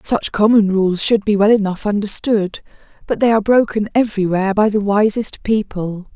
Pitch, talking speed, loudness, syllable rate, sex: 210 Hz, 165 wpm, -16 LUFS, 5.2 syllables/s, female